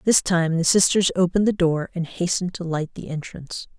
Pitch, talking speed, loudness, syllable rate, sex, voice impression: 175 Hz, 205 wpm, -21 LUFS, 5.7 syllables/s, female, feminine, middle-aged, tensed, slightly powerful, hard, clear, intellectual, calm, reassuring, elegant, sharp